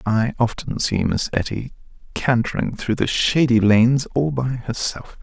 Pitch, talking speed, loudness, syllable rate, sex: 120 Hz, 150 wpm, -20 LUFS, 4.4 syllables/s, male